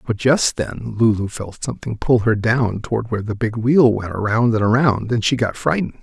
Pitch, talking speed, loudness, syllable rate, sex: 115 Hz, 220 wpm, -18 LUFS, 5.5 syllables/s, male